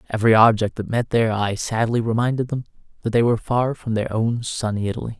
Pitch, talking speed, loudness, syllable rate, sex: 115 Hz, 210 wpm, -21 LUFS, 6.1 syllables/s, male